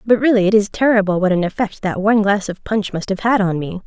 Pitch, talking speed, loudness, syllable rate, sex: 205 Hz, 280 wpm, -17 LUFS, 6.2 syllables/s, female